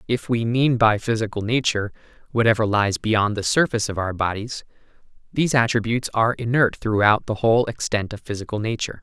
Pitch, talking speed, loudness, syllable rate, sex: 110 Hz, 165 wpm, -21 LUFS, 6.0 syllables/s, male